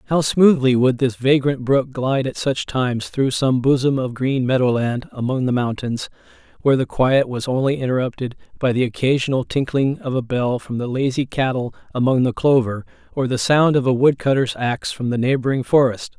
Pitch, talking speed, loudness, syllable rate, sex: 130 Hz, 185 wpm, -19 LUFS, 5.3 syllables/s, male